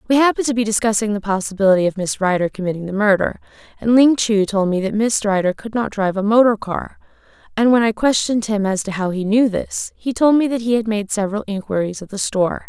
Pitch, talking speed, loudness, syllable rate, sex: 210 Hz, 235 wpm, -18 LUFS, 6.3 syllables/s, female